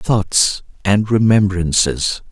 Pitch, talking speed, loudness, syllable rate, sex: 100 Hz, 80 wpm, -15 LUFS, 3.0 syllables/s, male